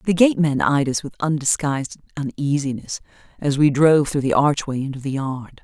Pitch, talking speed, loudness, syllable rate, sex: 145 Hz, 170 wpm, -20 LUFS, 5.6 syllables/s, female